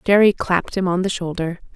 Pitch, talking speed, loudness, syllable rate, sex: 185 Hz, 205 wpm, -19 LUFS, 5.9 syllables/s, female